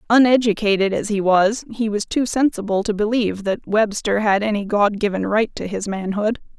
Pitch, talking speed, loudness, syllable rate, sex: 210 Hz, 180 wpm, -19 LUFS, 5.2 syllables/s, female